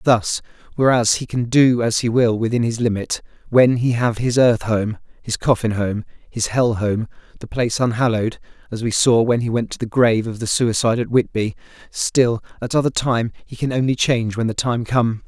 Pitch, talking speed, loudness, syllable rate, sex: 115 Hz, 205 wpm, -19 LUFS, 5.2 syllables/s, male